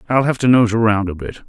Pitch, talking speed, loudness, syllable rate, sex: 110 Hz, 285 wpm, -16 LUFS, 6.3 syllables/s, male